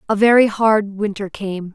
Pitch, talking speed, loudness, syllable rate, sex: 205 Hz, 170 wpm, -17 LUFS, 4.5 syllables/s, female